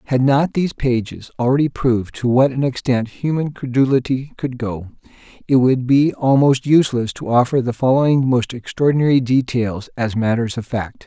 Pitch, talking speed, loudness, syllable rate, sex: 125 Hz, 165 wpm, -17 LUFS, 5.2 syllables/s, male